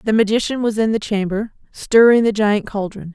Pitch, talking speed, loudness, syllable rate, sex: 215 Hz, 190 wpm, -17 LUFS, 5.3 syllables/s, female